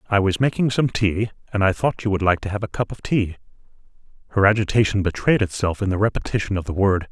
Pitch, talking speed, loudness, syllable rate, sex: 100 Hz, 230 wpm, -21 LUFS, 6.3 syllables/s, male